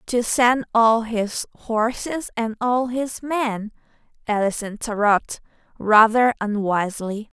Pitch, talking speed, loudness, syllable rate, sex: 225 Hz, 105 wpm, -21 LUFS, 4.0 syllables/s, female